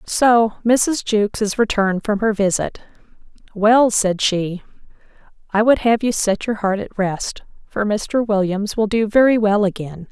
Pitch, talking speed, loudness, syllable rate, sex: 210 Hz, 165 wpm, -18 LUFS, 4.3 syllables/s, female